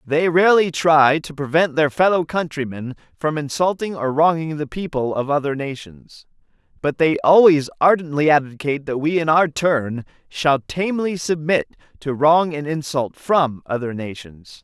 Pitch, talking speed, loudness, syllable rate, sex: 150 Hz, 150 wpm, -19 LUFS, 4.7 syllables/s, male